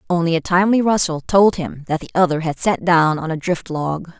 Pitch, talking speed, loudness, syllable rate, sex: 170 Hz, 230 wpm, -18 LUFS, 5.4 syllables/s, female